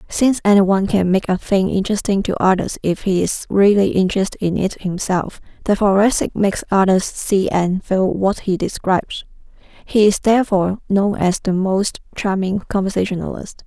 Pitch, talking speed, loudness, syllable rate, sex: 195 Hz, 160 wpm, -17 LUFS, 5.2 syllables/s, female